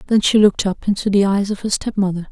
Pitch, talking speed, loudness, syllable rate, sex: 200 Hz, 285 wpm, -17 LUFS, 6.6 syllables/s, female